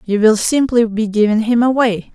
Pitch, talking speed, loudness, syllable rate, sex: 225 Hz, 195 wpm, -14 LUFS, 4.9 syllables/s, female